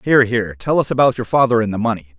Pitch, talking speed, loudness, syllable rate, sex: 115 Hz, 275 wpm, -17 LUFS, 7.5 syllables/s, male